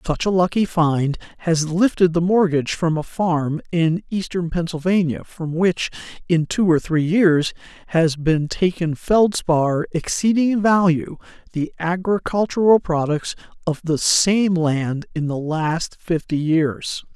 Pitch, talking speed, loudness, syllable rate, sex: 170 Hz, 140 wpm, -19 LUFS, 4.0 syllables/s, male